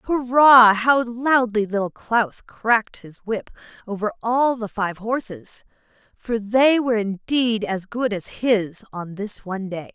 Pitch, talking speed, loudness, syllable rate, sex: 220 Hz, 150 wpm, -20 LUFS, 3.9 syllables/s, female